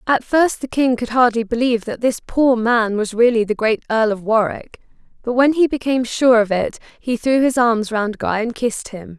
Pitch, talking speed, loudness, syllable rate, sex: 235 Hz, 220 wpm, -17 LUFS, 5.0 syllables/s, female